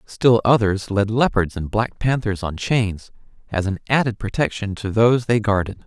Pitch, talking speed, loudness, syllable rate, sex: 105 Hz, 175 wpm, -20 LUFS, 4.7 syllables/s, male